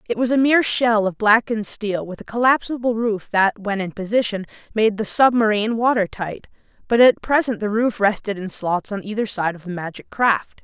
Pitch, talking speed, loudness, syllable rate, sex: 215 Hz, 195 wpm, -19 LUFS, 5.3 syllables/s, female